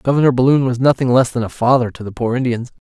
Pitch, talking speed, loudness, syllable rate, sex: 125 Hz, 245 wpm, -16 LUFS, 6.6 syllables/s, male